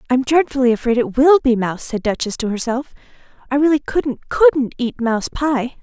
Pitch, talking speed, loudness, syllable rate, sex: 255 Hz, 185 wpm, -17 LUFS, 5.6 syllables/s, female